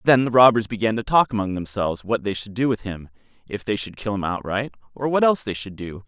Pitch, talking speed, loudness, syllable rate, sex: 105 Hz, 255 wpm, -22 LUFS, 6.2 syllables/s, male